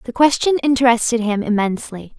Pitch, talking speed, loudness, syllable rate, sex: 240 Hz, 135 wpm, -17 LUFS, 5.8 syllables/s, female